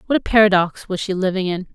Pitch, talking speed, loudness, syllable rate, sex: 195 Hz, 240 wpm, -18 LUFS, 6.5 syllables/s, female